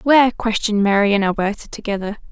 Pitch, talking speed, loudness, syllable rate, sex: 215 Hz, 155 wpm, -18 LUFS, 6.7 syllables/s, female